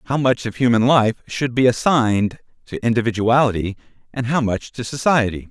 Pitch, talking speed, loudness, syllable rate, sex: 120 Hz, 165 wpm, -18 LUFS, 5.5 syllables/s, male